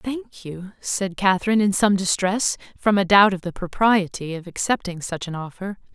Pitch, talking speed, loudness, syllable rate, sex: 195 Hz, 180 wpm, -21 LUFS, 4.9 syllables/s, female